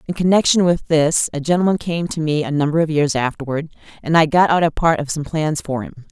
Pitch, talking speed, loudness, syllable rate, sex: 155 Hz, 245 wpm, -18 LUFS, 5.9 syllables/s, female